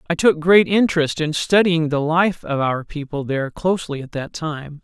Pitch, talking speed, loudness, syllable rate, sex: 160 Hz, 200 wpm, -19 LUFS, 5.0 syllables/s, male